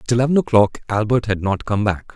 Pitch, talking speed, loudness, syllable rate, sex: 110 Hz, 225 wpm, -18 LUFS, 5.9 syllables/s, male